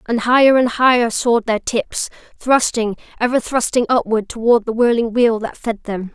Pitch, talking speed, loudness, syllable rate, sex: 235 Hz, 175 wpm, -16 LUFS, 4.9 syllables/s, female